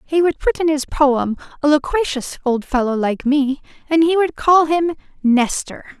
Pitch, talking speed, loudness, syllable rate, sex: 290 Hz, 180 wpm, -17 LUFS, 4.4 syllables/s, female